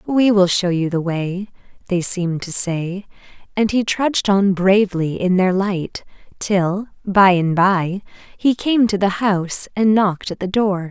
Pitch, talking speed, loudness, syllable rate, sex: 190 Hz, 175 wpm, -18 LUFS, 4.2 syllables/s, female